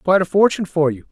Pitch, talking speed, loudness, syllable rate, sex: 175 Hz, 270 wpm, -17 LUFS, 8.1 syllables/s, male